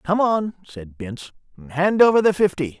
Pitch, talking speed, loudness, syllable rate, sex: 170 Hz, 170 wpm, -18 LUFS, 5.2 syllables/s, male